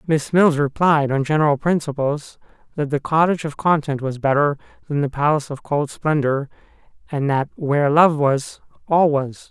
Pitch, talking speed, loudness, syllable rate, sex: 145 Hz, 165 wpm, -19 LUFS, 5.0 syllables/s, male